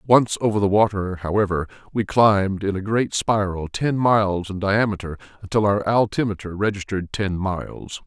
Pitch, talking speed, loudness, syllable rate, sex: 100 Hz, 155 wpm, -21 LUFS, 5.2 syllables/s, male